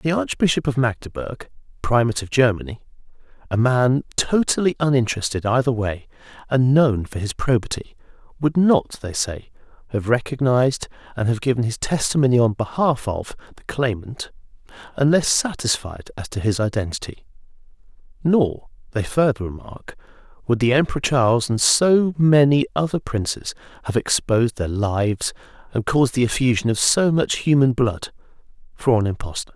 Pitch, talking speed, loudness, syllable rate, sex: 125 Hz, 140 wpm, -20 LUFS, 5.2 syllables/s, male